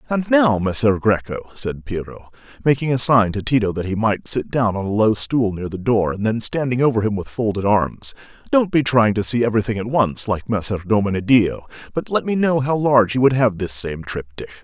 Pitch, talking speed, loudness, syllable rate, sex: 110 Hz, 220 wpm, -19 LUFS, 5.4 syllables/s, male